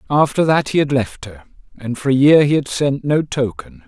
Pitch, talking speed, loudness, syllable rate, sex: 135 Hz, 215 wpm, -16 LUFS, 4.8 syllables/s, male